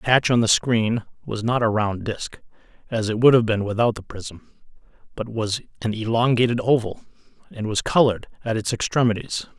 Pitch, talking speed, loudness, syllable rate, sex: 115 Hz, 180 wpm, -21 LUFS, 5.4 syllables/s, male